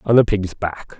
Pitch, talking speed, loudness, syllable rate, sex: 100 Hz, 240 wpm, -19 LUFS, 4.5 syllables/s, male